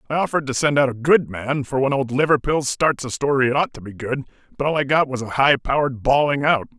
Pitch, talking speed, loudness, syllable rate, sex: 135 Hz, 265 wpm, -20 LUFS, 6.2 syllables/s, male